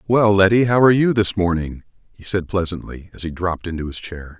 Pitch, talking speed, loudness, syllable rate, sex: 95 Hz, 220 wpm, -18 LUFS, 5.9 syllables/s, male